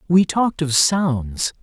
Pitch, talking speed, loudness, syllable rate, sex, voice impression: 155 Hz, 150 wpm, -18 LUFS, 3.6 syllables/s, male, very masculine, very middle-aged, very thick, very tensed, very powerful, very bright, soft, very clear, muffled, cool, slightly intellectual, refreshing, very sincere, very calm, mature, very friendly, very reassuring, very unique, slightly elegant, very wild, sweet, very lively, very kind, very intense